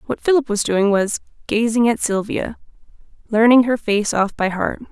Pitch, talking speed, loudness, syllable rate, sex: 220 Hz, 160 wpm, -18 LUFS, 4.8 syllables/s, female